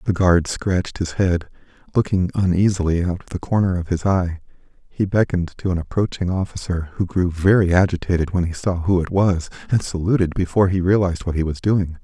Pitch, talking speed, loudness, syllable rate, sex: 90 Hz, 195 wpm, -20 LUFS, 5.7 syllables/s, male